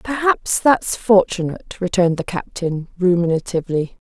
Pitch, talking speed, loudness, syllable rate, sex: 190 Hz, 100 wpm, -18 LUFS, 5.1 syllables/s, female